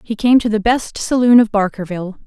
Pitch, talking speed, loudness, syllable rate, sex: 220 Hz, 210 wpm, -15 LUFS, 5.7 syllables/s, female